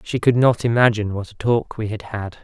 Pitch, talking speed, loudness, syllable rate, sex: 110 Hz, 245 wpm, -20 LUFS, 5.6 syllables/s, male